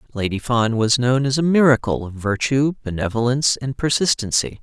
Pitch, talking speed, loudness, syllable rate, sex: 125 Hz, 155 wpm, -19 LUFS, 5.4 syllables/s, male